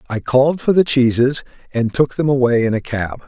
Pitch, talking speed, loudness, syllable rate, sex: 130 Hz, 220 wpm, -16 LUFS, 5.4 syllables/s, male